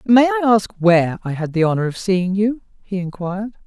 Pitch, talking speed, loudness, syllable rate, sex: 200 Hz, 215 wpm, -18 LUFS, 5.6 syllables/s, female